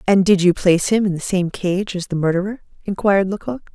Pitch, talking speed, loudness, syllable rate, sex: 190 Hz, 225 wpm, -18 LUFS, 5.9 syllables/s, female